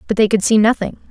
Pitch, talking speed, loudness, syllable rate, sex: 210 Hz, 270 wpm, -15 LUFS, 7.1 syllables/s, female